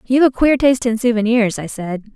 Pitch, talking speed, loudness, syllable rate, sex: 235 Hz, 225 wpm, -16 LUFS, 6.1 syllables/s, female